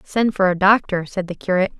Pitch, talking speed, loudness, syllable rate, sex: 190 Hz, 235 wpm, -19 LUFS, 6.1 syllables/s, female